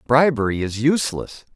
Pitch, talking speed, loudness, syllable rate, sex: 130 Hz, 115 wpm, -20 LUFS, 5.3 syllables/s, male